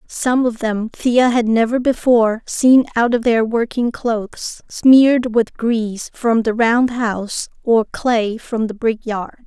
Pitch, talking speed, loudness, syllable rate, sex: 230 Hz, 160 wpm, -16 LUFS, 3.8 syllables/s, female